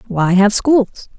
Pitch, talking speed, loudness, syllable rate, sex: 215 Hz, 150 wpm, -13 LUFS, 3.2 syllables/s, female